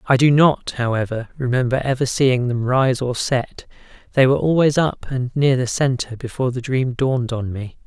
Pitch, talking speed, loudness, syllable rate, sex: 125 Hz, 190 wpm, -19 LUFS, 5.1 syllables/s, male